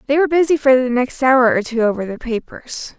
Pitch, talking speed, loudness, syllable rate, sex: 255 Hz, 240 wpm, -16 LUFS, 5.7 syllables/s, female